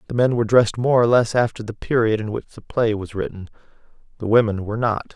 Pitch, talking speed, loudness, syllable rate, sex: 110 Hz, 235 wpm, -20 LUFS, 6.6 syllables/s, male